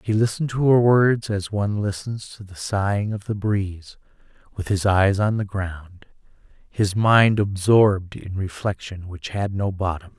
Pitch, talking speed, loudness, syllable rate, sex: 100 Hz, 170 wpm, -21 LUFS, 4.5 syllables/s, male